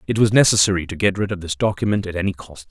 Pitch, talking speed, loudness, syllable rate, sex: 95 Hz, 265 wpm, -19 LUFS, 7.1 syllables/s, male